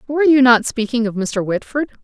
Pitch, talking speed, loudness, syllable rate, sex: 245 Hz, 205 wpm, -16 LUFS, 5.7 syllables/s, female